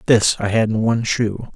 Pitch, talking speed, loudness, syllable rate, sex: 110 Hz, 230 wpm, -18 LUFS, 5.3 syllables/s, male